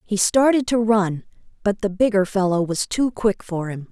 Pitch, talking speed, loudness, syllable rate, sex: 205 Hz, 200 wpm, -20 LUFS, 4.7 syllables/s, female